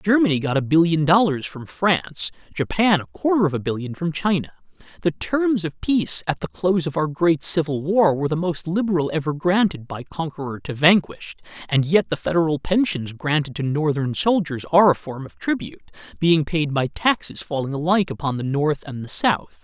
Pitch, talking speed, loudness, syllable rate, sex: 160 Hz, 195 wpm, -21 LUFS, 5.4 syllables/s, male